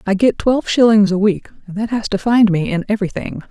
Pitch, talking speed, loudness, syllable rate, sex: 210 Hz, 240 wpm, -16 LUFS, 6.0 syllables/s, female